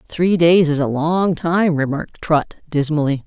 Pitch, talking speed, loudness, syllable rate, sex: 160 Hz, 165 wpm, -17 LUFS, 4.4 syllables/s, female